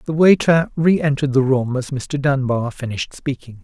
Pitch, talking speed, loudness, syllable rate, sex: 140 Hz, 165 wpm, -18 LUFS, 5.2 syllables/s, male